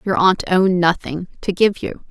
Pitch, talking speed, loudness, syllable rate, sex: 185 Hz, 200 wpm, -17 LUFS, 5.0 syllables/s, female